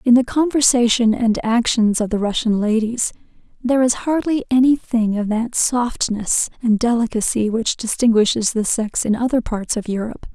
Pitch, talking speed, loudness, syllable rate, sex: 230 Hz, 160 wpm, -18 LUFS, 4.9 syllables/s, female